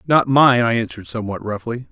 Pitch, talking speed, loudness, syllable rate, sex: 120 Hz, 190 wpm, -18 LUFS, 6.4 syllables/s, male